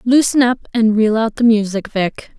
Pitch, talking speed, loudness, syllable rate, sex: 225 Hz, 200 wpm, -15 LUFS, 4.7 syllables/s, female